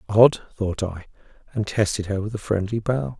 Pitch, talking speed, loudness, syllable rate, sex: 105 Hz, 190 wpm, -23 LUFS, 5.0 syllables/s, male